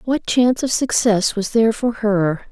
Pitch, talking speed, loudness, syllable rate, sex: 225 Hz, 190 wpm, -18 LUFS, 4.7 syllables/s, female